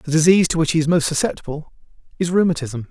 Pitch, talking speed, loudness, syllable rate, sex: 160 Hz, 205 wpm, -18 LUFS, 7.0 syllables/s, male